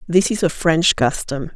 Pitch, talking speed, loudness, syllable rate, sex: 165 Hz, 195 wpm, -18 LUFS, 4.3 syllables/s, female